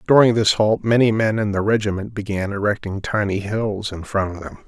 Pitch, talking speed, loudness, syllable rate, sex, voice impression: 105 Hz, 205 wpm, -20 LUFS, 5.4 syllables/s, male, masculine, very adult-like, thick, cool, sincere, calm, mature, slightly wild